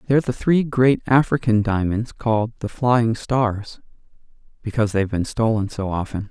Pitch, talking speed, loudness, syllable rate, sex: 115 Hz, 150 wpm, -20 LUFS, 5.0 syllables/s, male